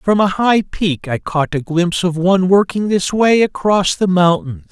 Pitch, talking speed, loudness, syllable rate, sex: 185 Hz, 205 wpm, -15 LUFS, 4.5 syllables/s, male